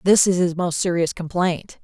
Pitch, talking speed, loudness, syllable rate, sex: 175 Hz, 195 wpm, -20 LUFS, 4.7 syllables/s, female